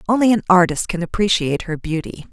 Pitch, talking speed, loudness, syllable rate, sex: 185 Hz, 180 wpm, -18 LUFS, 6.3 syllables/s, female